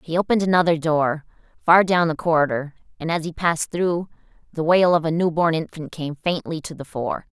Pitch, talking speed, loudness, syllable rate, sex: 165 Hz, 205 wpm, -21 LUFS, 5.5 syllables/s, female